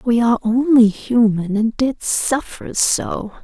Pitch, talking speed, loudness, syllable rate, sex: 230 Hz, 140 wpm, -17 LUFS, 3.7 syllables/s, female